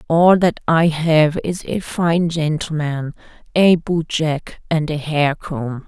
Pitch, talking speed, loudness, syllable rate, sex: 160 Hz, 155 wpm, -18 LUFS, 3.4 syllables/s, female